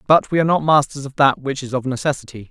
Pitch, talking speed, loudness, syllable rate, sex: 140 Hz, 265 wpm, -18 LUFS, 6.8 syllables/s, male